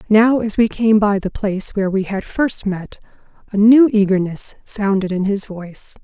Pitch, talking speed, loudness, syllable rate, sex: 205 Hz, 190 wpm, -17 LUFS, 4.8 syllables/s, female